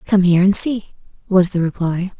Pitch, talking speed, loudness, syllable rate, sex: 185 Hz, 190 wpm, -16 LUFS, 5.3 syllables/s, female